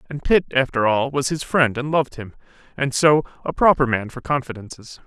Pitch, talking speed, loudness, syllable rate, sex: 135 Hz, 200 wpm, -20 LUFS, 5.6 syllables/s, male